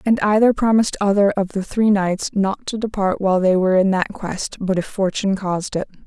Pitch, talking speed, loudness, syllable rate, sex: 195 Hz, 220 wpm, -19 LUFS, 5.6 syllables/s, female